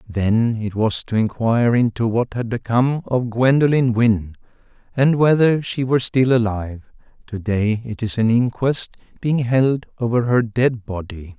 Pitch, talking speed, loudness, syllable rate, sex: 115 Hz, 160 wpm, -19 LUFS, 4.6 syllables/s, male